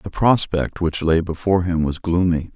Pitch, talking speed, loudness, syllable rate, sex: 85 Hz, 190 wpm, -19 LUFS, 4.8 syllables/s, male